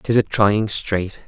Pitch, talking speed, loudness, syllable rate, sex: 105 Hz, 190 wpm, -19 LUFS, 3.6 syllables/s, male